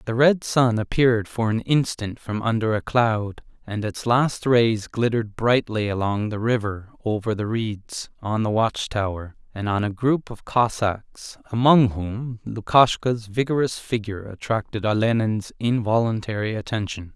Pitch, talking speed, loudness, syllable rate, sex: 110 Hz, 145 wpm, -22 LUFS, 4.4 syllables/s, male